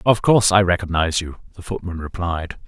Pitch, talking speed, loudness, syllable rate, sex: 90 Hz, 180 wpm, -19 LUFS, 5.8 syllables/s, male